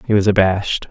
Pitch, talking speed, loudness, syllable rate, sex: 100 Hz, 200 wpm, -16 LUFS, 6.5 syllables/s, male